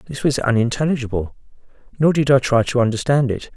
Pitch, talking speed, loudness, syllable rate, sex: 125 Hz, 170 wpm, -18 LUFS, 6.2 syllables/s, male